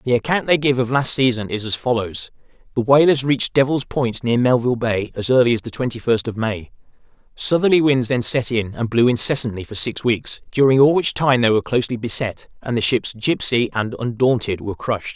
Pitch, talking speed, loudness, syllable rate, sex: 120 Hz, 210 wpm, -18 LUFS, 5.7 syllables/s, male